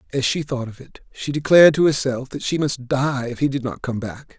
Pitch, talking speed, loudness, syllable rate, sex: 135 Hz, 260 wpm, -20 LUFS, 5.4 syllables/s, male